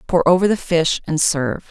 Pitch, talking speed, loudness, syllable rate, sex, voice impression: 165 Hz, 210 wpm, -17 LUFS, 5.3 syllables/s, female, very feminine, very middle-aged, slightly thin, tensed, slightly powerful, bright, hard, very clear, very fluent, cool, very intellectual, refreshing, very sincere, very calm, very friendly, very reassuring, slightly unique, elegant, slightly wild, sweet, slightly lively, slightly kind, slightly modest